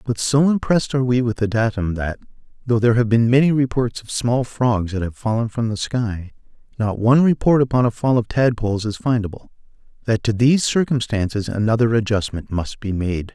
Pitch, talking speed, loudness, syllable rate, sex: 115 Hz, 195 wpm, -19 LUFS, 5.6 syllables/s, male